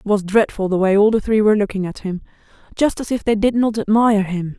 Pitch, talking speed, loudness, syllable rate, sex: 210 Hz, 260 wpm, -17 LUFS, 6.2 syllables/s, female